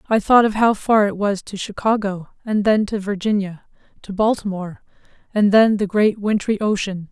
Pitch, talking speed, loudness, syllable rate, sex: 205 Hz, 170 wpm, -19 LUFS, 5.1 syllables/s, female